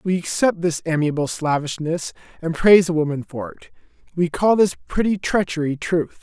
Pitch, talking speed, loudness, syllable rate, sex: 165 Hz, 165 wpm, -20 LUFS, 5.1 syllables/s, male